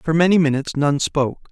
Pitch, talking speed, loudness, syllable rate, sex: 150 Hz, 200 wpm, -18 LUFS, 6.1 syllables/s, male